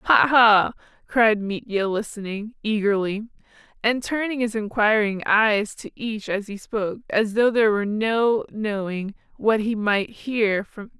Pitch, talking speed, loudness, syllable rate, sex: 215 Hz, 155 wpm, -22 LUFS, 4.2 syllables/s, female